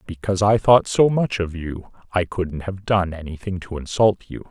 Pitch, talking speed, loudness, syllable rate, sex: 95 Hz, 200 wpm, -21 LUFS, 4.9 syllables/s, male